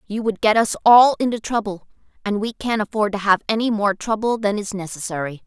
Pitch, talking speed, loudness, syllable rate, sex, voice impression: 210 Hz, 210 wpm, -19 LUFS, 5.7 syllables/s, female, feminine, slightly adult-like, slightly bright, clear, slightly refreshing, friendly